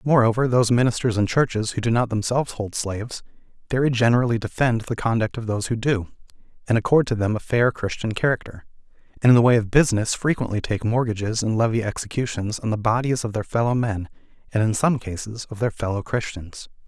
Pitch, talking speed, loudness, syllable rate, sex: 115 Hz, 195 wpm, -22 LUFS, 6.2 syllables/s, male